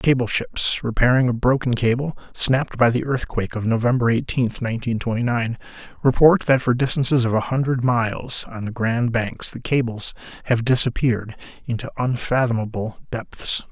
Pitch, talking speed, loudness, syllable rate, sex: 120 Hz, 155 wpm, -21 LUFS, 5.2 syllables/s, male